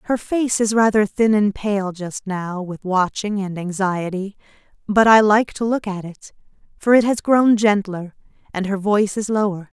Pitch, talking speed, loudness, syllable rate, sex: 205 Hz, 185 wpm, -19 LUFS, 4.5 syllables/s, female